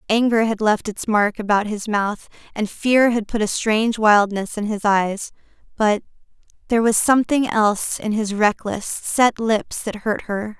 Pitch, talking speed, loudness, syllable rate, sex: 215 Hz, 165 wpm, -19 LUFS, 4.5 syllables/s, female